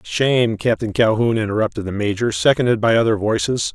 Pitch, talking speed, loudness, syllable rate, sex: 115 Hz, 160 wpm, -18 LUFS, 5.8 syllables/s, male